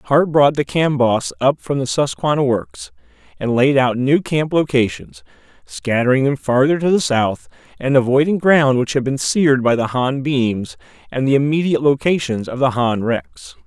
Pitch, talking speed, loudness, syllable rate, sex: 130 Hz, 175 wpm, -17 LUFS, 4.7 syllables/s, male